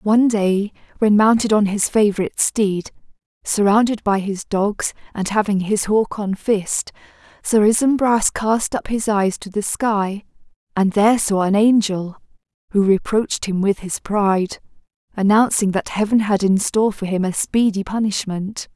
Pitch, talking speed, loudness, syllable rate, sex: 205 Hz, 155 wpm, -18 LUFS, 4.5 syllables/s, female